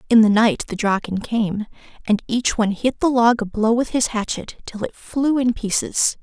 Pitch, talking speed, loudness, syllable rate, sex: 225 Hz, 210 wpm, -20 LUFS, 4.7 syllables/s, female